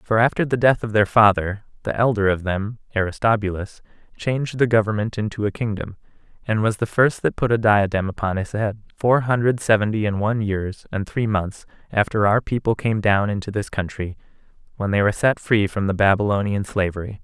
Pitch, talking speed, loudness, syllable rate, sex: 105 Hz, 190 wpm, -21 LUFS, 5.5 syllables/s, male